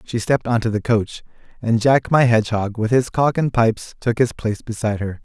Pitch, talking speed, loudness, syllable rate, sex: 115 Hz, 220 wpm, -19 LUFS, 5.7 syllables/s, male